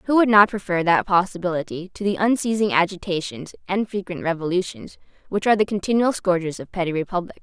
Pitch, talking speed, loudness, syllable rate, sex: 185 Hz, 170 wpm, -21 LUFS, 6.1 syllables/s, female